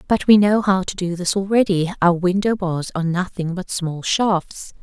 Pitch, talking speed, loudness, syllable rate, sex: 185 Hz, 200 wpm, -19 LUFS, 4.7 syllables/s, female